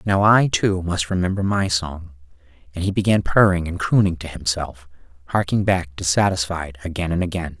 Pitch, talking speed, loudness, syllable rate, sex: 85 Hz, 165 wpm, -20 LUFS, 5.2 syllables/s, male